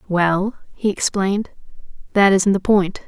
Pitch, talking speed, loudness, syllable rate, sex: 195 Hz, 135 wpm, -18 LUFS, 4.4 syllables/s, female